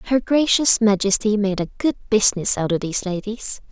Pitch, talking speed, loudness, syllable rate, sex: 210 Hz, 180 wpm, -19 LUFS, 5.3 syllables/s, female